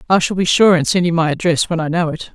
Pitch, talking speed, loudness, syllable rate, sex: 170 Hz, 335 wpm, -15 LUFS, 6.5 syllables/s, female